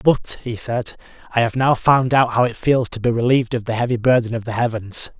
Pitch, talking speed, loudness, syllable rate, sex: 120 Hz, 245 wpm, -19 LUFS, 5.6 syllables/s, male